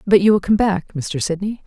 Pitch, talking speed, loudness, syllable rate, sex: 195 Hz, 250 wpm, -18 LUFS, 5.6 syllables/s, female